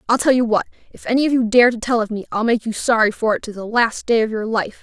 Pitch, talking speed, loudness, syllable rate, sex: 230 Hz, 325 wpm, -18 LUFS, 6.4 syllables/s, female